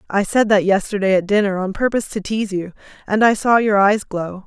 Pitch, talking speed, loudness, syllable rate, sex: 200 Hz, 230 wpm, -17 LUFS, 5.9 syllables/s, female